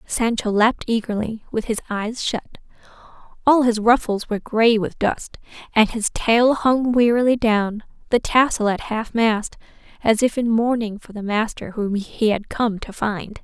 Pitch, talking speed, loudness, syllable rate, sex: 225 Hz, 170 wpm, -20 LUFS, 4.5 syllables/s, female